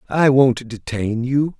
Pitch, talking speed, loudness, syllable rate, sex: 130 Hz, 150 wpm, -18 LUFS, 3.6 syllables/s, male